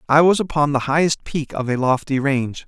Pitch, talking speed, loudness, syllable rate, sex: 145 Hz, 225 wpm, -19 LUFS, 5.6 syllables/s, male